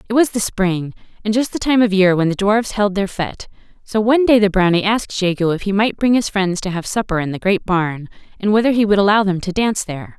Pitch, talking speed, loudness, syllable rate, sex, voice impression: 200 Hz, 265 wpm, -17 LUFS, 6.1 syllables/s, female, very feminine, very adult-like, very thin, slightly tensed, powerful, very bright, slightly hard, very clear, very fluent, slightly raspy, cool, very intellectual, refreshing, sincere, slightly calm, friendly, very reassuring, unique, slightly elegant, wild, sweet, very lively, strict, intense, slightly sharp, light